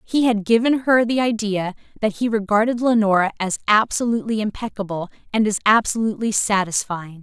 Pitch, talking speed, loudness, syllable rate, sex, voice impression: 215 Hz, 140 wpm, -20 LUFS, 5.7 syllables/s, female, feminine, adult-like, tensed, powerful, bright, clear, fluent, intellectual, friendly, lively, slightly intense, sharp